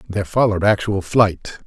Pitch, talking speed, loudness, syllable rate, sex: 100 Hz, 145 wpm, -18 LUFS, 5.6 syllables/s, male